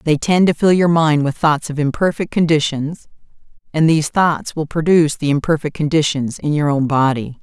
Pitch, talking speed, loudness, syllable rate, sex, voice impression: 155 Hz, 185 wpm, -16 LUFS, 5.2 syllables/s, female, feminine, slightly gender-neutral, adult-like, middle-aged, slightly thick, tensed, powerful, slightly bright, slightly hard, clear, fluent, slightly cool, intellectual, sincere, calm, slightly mature, reassuring, elegant, slightly strict, slightly sharp